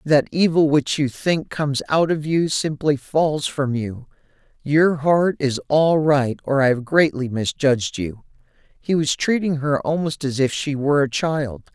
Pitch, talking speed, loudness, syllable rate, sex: 145 Hz, 180 wpm, -20 LUFS, 4.3 syllables/s, male